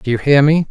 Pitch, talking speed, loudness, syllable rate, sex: 140 Hz, 340 wpm, -12 LUFS, 6.1 syllables/s, male